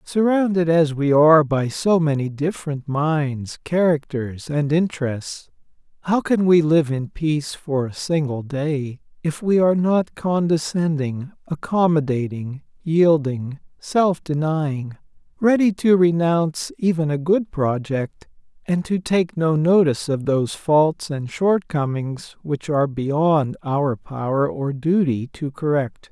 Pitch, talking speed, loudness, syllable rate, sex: 155 Hz, 130 wpm, -20 LUFS, 4.0 syllables/s, male